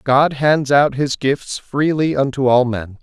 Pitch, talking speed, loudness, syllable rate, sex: 135 Hz, 180 wpm, -16 LUFS, 3.7 syllables/s, male